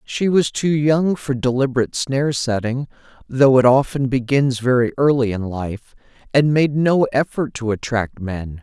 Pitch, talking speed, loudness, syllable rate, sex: 130 Hz, 145 wpm, -18 LUFS, 4.6 syllables/s, male